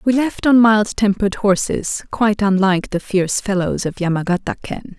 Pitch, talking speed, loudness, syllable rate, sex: 200 Hz, 170 wpm, -17 LUFS, 5.2 syllables/s, female